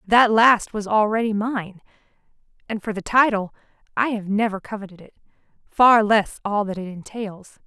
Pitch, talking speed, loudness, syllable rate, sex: 210 Hz, 150 wpm, -20 LUFS, 4.8 syllables/s, female